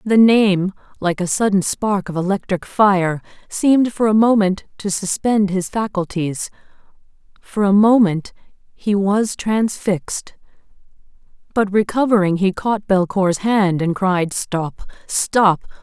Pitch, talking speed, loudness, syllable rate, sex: 195 Hz, 120 wpm, -18 LUFS, 3.9 syllables/s, female